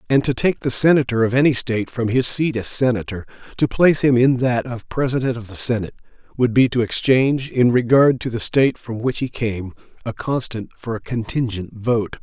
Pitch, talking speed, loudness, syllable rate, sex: 120 Hz, 205 wpm, -19 LUFS, 5.5 syllables/s, male